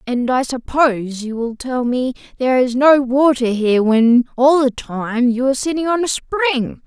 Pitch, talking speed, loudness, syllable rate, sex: 245 Hz, 190 wpm, -16 LUFS, 4.6 syllables/s, male